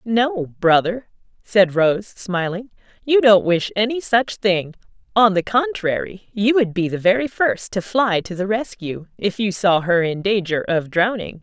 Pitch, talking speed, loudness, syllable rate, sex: 200 Hz, 175 wpm, -19 LUFS, 4.1 syllables/s, female